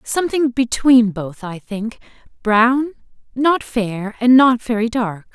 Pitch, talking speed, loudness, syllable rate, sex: 235 Hz, 125 wpm, -17 LUFS, 3.7 syllables/s, female